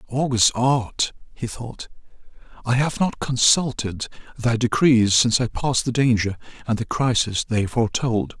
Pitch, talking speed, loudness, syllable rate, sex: 120 Hz, 145 wpm, -21 LUFS, 4.6 syllables/s, male